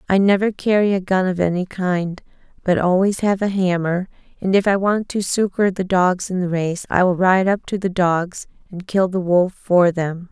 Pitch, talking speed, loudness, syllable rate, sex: 185 Hz, 215 wpm, -19 LUFS, 4.7 syllables/s, female